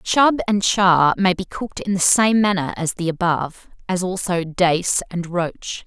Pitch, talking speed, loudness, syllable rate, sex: 180 Hz, 185 wpm, -19 LUFS, 4.2 syllables/s, female